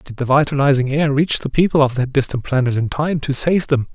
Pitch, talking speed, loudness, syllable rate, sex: 140 Hz, 245 wpm, -17 LUFS, 5.7 syllables/s, male